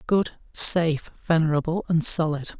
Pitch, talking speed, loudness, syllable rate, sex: 160 Hz, 115 wpm, -22 LUFS, 4.6 syllables/s, male